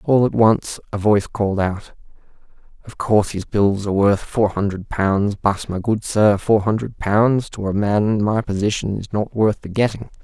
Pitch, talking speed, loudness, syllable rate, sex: 105 Hz, 200 wpm, -19 LUFS, 4.8 syllables/s, male